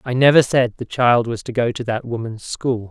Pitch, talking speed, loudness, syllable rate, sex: 120 Hz, 250 wpm, -18 LUFS, 5.1 syllables/s, male